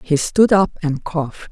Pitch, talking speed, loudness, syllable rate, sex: 170 Hz, 200 wpm, -17 LUFS, 4.6 syllables/s, female